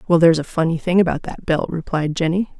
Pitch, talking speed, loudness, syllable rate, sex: 170 Hz, 230 wpm, -19 LUFS, 6.4 syllables/s, female